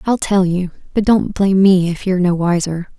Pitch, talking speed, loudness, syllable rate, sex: 185 Hz, 220 wpm, -15 LUFS, 5.4 syllables/s, female